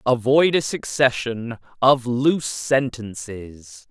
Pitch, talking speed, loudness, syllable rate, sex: 120 Hz, 90 wpm, -20 LUFS, 3.4 syllables/s, male